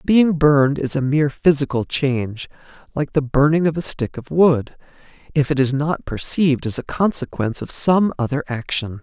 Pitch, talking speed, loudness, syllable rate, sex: 145 Hz, 180 wpm, -19 LUFS, 5.1 syllables/s, male